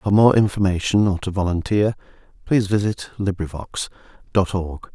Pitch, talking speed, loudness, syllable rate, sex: 95 Hz, 135 wpm, -20 LUFS, 5.1 syllables/s, male